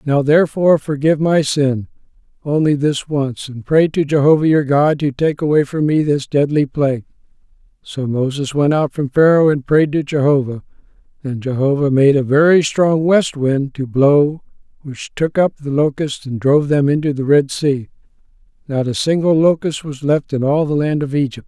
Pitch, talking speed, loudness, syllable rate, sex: 145 Hz, 185 wpm, -16 LUFS, 4.9 syllables/s, male